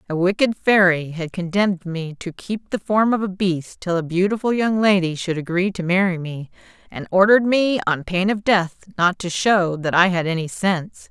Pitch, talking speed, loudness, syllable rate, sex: 185 Hz, 205 wpm, -19 LUFS, 5.0 syllables/s, female